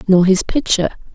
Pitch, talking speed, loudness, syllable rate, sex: 200 Hz, 155 wpm, -15 LUFS, 5.9 syllables/s, female